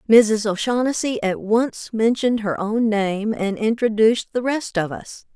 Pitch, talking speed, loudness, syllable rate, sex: 220 Hz, 155 wpm, -20 LUFS, 4.4 syllables/s, female